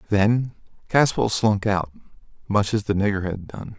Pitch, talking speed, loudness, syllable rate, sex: 105 Hz, 160 wpm, -22 LUFS, 4.5 syllables/s, male